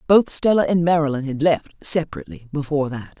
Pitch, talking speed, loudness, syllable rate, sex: 150 Hz, 170 wpm, -20 LUFS, 6.1 syllables/s, female